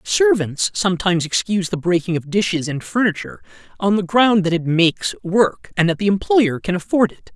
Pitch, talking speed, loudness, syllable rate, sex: 185 Hz, 190 wpm, -18 LUFS, 5.5 syllables/s, male